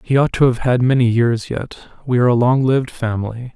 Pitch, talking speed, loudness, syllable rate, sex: 125 Hz, 235 wpm, -17 LUFS, 5.8 syllables/s, male